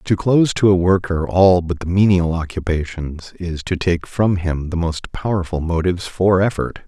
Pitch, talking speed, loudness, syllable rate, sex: 90 Hz, 185 wpm, -18 LUFS, 4.8 syllables/s, male